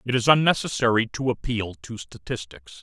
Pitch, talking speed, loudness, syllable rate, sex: 115 Hz, 150 wpm, -23 LUFS, 5.1 syllables/s, male